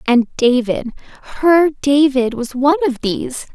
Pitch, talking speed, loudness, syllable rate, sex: 265 Hz, 100 wpm, -16 LUFS, 4.4 syllables/s, female